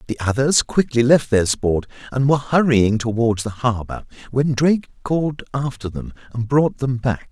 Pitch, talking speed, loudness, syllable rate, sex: 125 Hz, 170 wpm, -19 LUFS, 4.9 syllables/s, male